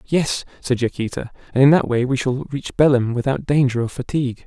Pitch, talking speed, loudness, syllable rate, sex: 130 Hz, 200 wpm, -19 LUFS, 5.5 syllables/s, male